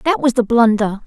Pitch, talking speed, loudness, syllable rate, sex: 240 Hz, 225 wpm, -15 LUFS, 5.4 syllables/s, female